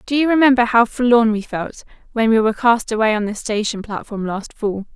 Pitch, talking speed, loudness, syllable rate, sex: 225 Hz, 220 wpm, -17 LUFS, 5.6 syllables/s, female